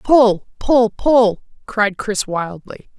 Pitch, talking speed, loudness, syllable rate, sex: 220 Hz, 120 wpm, -17 LUFS, 2.9 syllables/s, female